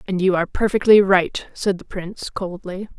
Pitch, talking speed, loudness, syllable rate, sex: 190 Hz, 180 wpm, -19 LUFS, 5.2 syllables/s, female